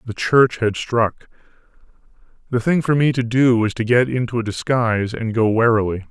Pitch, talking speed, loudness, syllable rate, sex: 115 Hz, 185 wpm, -18 LUFS, 5.1 syllables/s, male